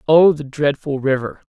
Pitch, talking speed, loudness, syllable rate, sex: 145 Hz, 160 wpm, -17 LUFS, 4.7 syllables/s, male